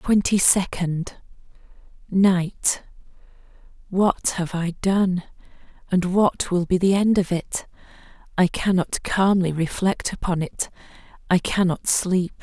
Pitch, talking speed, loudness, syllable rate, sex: 180 Hz, 110 wpm, -22 LUFS, 3.7 syllables/s, female